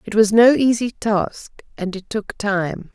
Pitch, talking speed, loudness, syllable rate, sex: 215 Hz, 185 wpm, -18 LUFS, 3.9 syllables/s, female